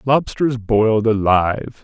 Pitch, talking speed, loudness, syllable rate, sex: 115 Hz, 100 wpm, -17 LUFS, 4.1 syllables/s, male